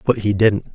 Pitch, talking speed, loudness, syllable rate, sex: 110 Hz, 245 wpm, -17 LUFS, 4.8 syllables/s, male